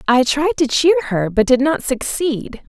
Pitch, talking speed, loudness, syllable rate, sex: 275 Hz, 195 wpm, -17 LUFS, 4.1 syllables/s, female